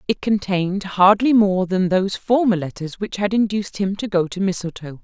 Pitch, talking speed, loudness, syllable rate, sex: 195 Hz, 190 wpm, -19 LUFS, 5.3 syllables/s, female